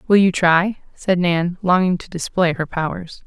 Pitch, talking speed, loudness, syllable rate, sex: 175 Hz, 185 wpm, -18 LUFS, 4.4 syllables/s, female